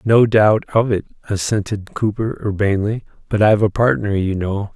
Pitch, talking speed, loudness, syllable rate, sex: 105 Hz, 165 wpm, -18 LUFS, 5.2 syllables/s, male